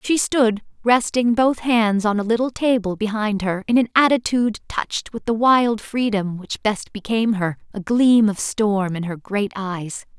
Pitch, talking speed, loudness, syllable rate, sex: 220 Hz, 185 wpm, -20 LUFS, 4.4 syllables/s, female